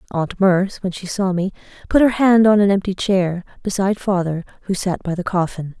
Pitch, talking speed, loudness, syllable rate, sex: 190 Hz, 205 wpm, -18 LUFS, 5.4 syllables/s, female